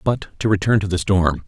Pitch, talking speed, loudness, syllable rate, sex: 100 Hz, 245 wpm, -19 LUFS, 5.3 syllables/s, male